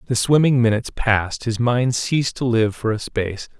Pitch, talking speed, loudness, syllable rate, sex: 120 Hz, 200 wpm, -19 LUFS, 5.4 syllables/s, male